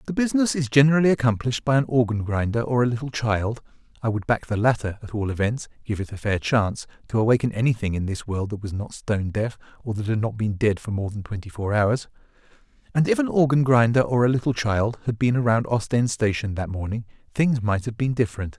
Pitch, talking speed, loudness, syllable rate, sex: 115 Hz, 220 wpm, -23 LUFS, 4.7 syllables/s, male